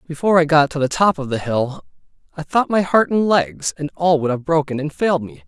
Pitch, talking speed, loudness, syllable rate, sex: 155 Hz, 250 wpm, -18 LUFS, 5.8 syllables/s, male